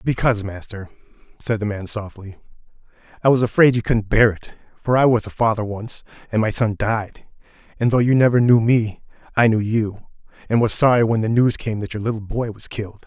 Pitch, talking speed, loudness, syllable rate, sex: 110 Hz, 205 wpm, -19 LUFS, 5.6 syllables/s, male